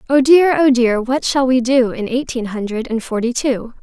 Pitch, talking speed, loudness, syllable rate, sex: 250 Hz, 220 wpm, -16 LUFS, 4.8 syllables/s, female